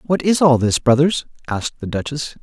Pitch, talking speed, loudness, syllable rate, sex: 140 Hz, 200 wpm, -18 LUFS, 5.3 syllables/s, male